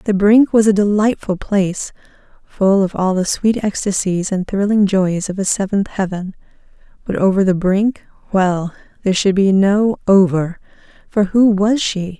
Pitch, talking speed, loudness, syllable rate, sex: 195 Hz, 155 wpm, -16 LUFS, 4.5 syllables/s, female